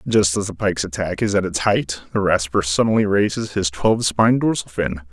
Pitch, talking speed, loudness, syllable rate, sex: 95 Hz, 210 wpm, -19 LUFS, 5.8 syllables/s, male